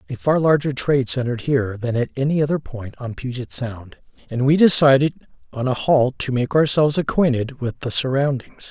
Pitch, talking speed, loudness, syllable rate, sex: 135 Hz, 185 wpm, -20 LUFS, 5.6 syllables/s, male